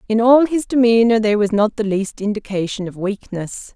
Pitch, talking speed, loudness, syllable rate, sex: 215 Hz, 190 wpm, -17 LUFS, 5.3 syllables/s, female